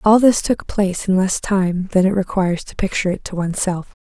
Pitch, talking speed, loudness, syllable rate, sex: 190 Hz, 240 wpm, -18 LUFS, 5.8 syllables/s, female